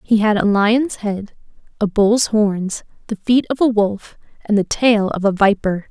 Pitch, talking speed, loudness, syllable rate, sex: 210 Hz, 195 wpm, -17 LUFS, 4.1 syllables/s, female